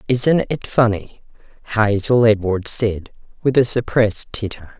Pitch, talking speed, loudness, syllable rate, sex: 110 Hz, 125 wpm, -18 LUFS, 4.2 syllables/s, female